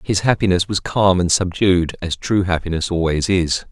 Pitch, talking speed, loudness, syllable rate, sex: 90 Hz, 175 wpm, -18 LUFS, 4.8 syllables/s, male